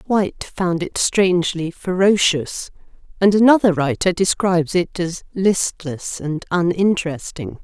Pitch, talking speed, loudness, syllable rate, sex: 180 Hz, 110 wpm, -18 LUFS, 4.3 syllables/s, female